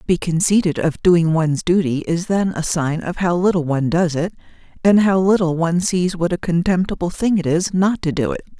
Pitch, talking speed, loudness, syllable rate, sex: 175 Hz, 225 wpm, -18 LUFS, 5.4 syllables/s, female